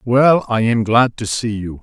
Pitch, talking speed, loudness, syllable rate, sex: 115 Hz, 230 wpm, -16 LUFS, 4.1 syllables/s, male